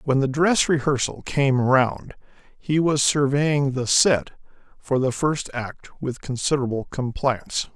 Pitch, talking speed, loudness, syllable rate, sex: 135 Hz, 140 wpm, -22 LUFS, 4.1 syllables/s, male